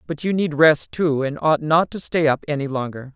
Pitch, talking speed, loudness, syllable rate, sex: 150 Hz, 250 wpm, -20 LUFS, 5.1 syllables/s, female